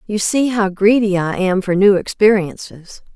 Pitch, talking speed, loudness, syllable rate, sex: 200 Hz, 170 wpm, -15 LUFS, 4.5 syllables/s, female